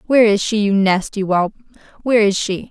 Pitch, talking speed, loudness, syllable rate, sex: 205 Hz, 200 wpm, -16 LUFS, 5.8 syllables/s, female